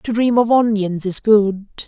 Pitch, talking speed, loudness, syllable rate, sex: 215 Hz, 190 wpm, -16 LUFS, 4.2 syllables/s, female